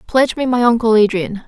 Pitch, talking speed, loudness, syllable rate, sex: 230 Hz, 205 wpm, -15 LUFS, 6.1 syllables/s, female